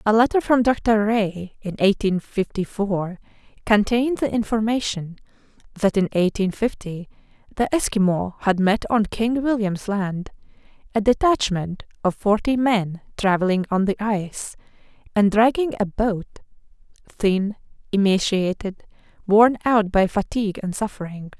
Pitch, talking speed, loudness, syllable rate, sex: 205 Hz, 125 wpm, -21 LUFS, 4.5 syllables/s, female